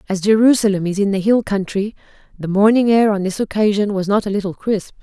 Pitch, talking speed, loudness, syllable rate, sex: 205 Hz, 215 wpm, -17 LUFS, 6.0 syllables/s, female